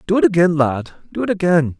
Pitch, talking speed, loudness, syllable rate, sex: 160 Hz, 235 wpm, -17 LUFS, 6.0 syllables/s, male